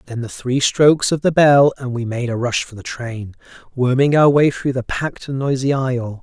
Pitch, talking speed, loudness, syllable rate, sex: 130 Hz, 230 wpm, -17 LUFS, 5.1 syllables/s, male